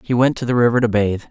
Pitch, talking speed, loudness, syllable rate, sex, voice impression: 115 Hz, 325 wpm, -17 LUFS, 6.9 syllables/s, male, very masculine, very adult-like, very middle-aged, very thick, tensed, very powerful, slightly dark, very hard, clear, fluent, cool, very intellectual, sincere, very calm, slightly friendly, slightly reassuring, unique, elegant, slightly wild, slightly sweet, kind, modest